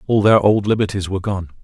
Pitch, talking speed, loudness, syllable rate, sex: 100 Hz, 220 wpm, -17 LUFS, 6.5 syllables/s, male